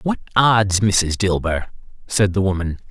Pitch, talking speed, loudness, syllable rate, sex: 100 Hz, 145 wpm, -18 LUFS, 4.2 syllables/s, male